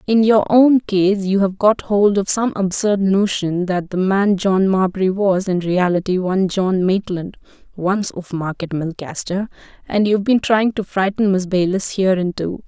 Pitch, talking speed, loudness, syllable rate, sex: 195 Hz, 180 wpm, -17 LUFS, 4.5 syllables/s, female